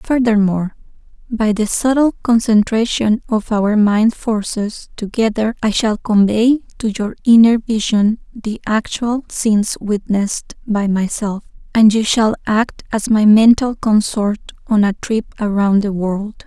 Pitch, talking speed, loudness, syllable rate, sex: 215 Hz, 135 wpm, -16 LUFS, 4.1 syllables/s, female